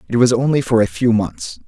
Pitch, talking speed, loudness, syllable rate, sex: 115 Hz, 250 wpm, -16 LUFS, 5.5 syllables/s, male